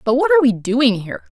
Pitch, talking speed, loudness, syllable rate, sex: 255 Hz, 265 wpm, -16 LUFS, 7.4 syllables/s, female